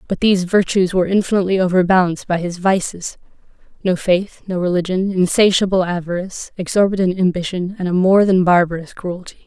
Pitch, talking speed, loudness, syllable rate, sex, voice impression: 185 Hz, 145 wpm, -17 LUFS, 6.0 syllables/s, female, very feminine, slightly young, very adult-like, thin, tensed, powerful, slightly dark, hard, very clear, very fluent, slightly cute, cool, intellectual, refreshing, very calm, friendly, reassuring, unique, very elegant, slightly wild, sweet, lively, strict, slightly intense, slightly sharp, light